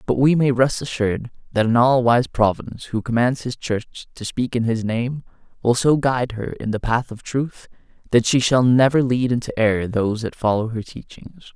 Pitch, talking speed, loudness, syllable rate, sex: 120 Hz, 210 wpm, -20 LUFS, 5.2 syllables/s, male